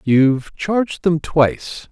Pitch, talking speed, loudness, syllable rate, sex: 155 Hz, 125 wpm, -17 LUFS, 3.9 syllables/s, male